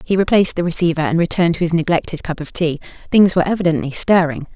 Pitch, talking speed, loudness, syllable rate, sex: 170 Hz, 210 wpm, -17 LUFS, 7.1 syllables/s, female